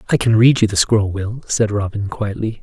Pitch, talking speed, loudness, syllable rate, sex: 110 Hz, 230 wpm, -17 LUFS, 5.2 syllables/s, male